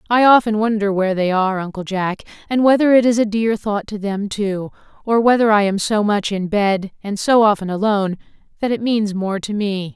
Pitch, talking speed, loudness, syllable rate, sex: 205 Hz, 215 wpm, -17 LUFS, 5.3 syllables/s, female